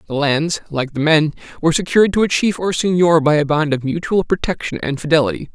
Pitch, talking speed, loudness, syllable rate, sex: 160 Hz, 215 wpm, -17 LUFS, 6.0 syllables/s, male